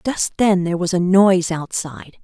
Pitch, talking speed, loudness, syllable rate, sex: 180 Hz, 190 wpm, -17 LUFS, 5.5 syllables/s, female